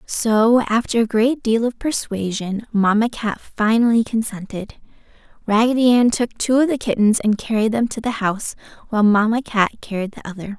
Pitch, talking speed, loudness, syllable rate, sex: 225 Hz, 170 wpm, -18 LUFS, 5.0 syllables/s, female